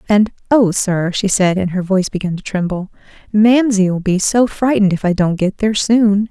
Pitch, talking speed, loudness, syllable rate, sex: 200 Hz, 200 wpm, -15 LUFS, 5.1 syllables/s, female